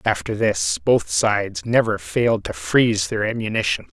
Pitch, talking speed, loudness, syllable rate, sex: 110 Hz, 150 wpm, -20 LUFS, 4.8 syllables/s, male